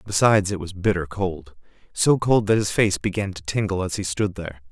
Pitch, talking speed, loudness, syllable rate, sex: 95 Hz, 205 wpm, -22 LUFS, 5.6 syllables/s, male